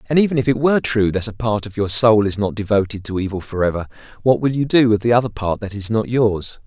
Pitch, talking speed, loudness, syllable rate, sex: 110 Hz, 270 wpm, -18 LUFS, 6.2 syllables/s, male